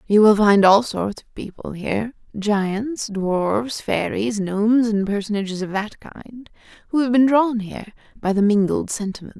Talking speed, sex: 185 wpm, female